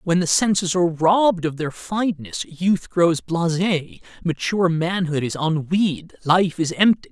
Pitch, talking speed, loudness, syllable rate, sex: 170 Hz, 150 wpm, -20 LUFS, 4.5 syllables/s, male